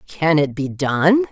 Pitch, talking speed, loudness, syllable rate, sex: 165 Hz, 185 wpm, -18 LUFS, 3.5 syllables/s, female